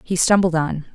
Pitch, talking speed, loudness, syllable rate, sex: 170 Hz, 190 wpm, -18 LUFS, 5.1 syllables/s, female